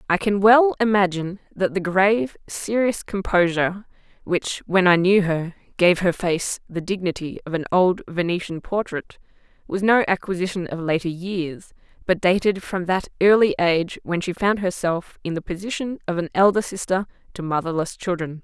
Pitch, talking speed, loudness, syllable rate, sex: 185 Hz, 165 wpm, -21 LUFS, 5.0 syllables/s, female